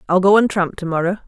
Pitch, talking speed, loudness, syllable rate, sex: 185 Hz, 285 wpm, -17 LUFS, 6.9 syllables/s, female